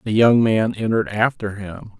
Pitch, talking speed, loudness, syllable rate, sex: 110 Hz, 180 wpm, -18 LUFS, 4.9 syllables/s, male